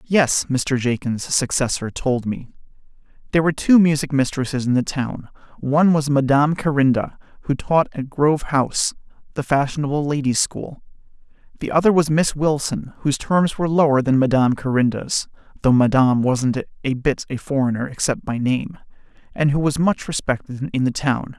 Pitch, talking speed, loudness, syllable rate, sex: 140 Hz, 150 wpm, -19 LUFS, 5.3 syllables/s, male